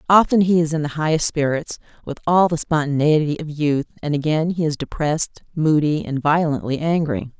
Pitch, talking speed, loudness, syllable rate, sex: 155 Hz, 180 wpm, -20 LUFS, 5.5 syllables/s, female